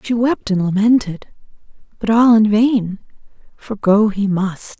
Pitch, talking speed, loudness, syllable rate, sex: 210 Hz, 150 wpm, -15 LUFS, 4.0 syllables/s, female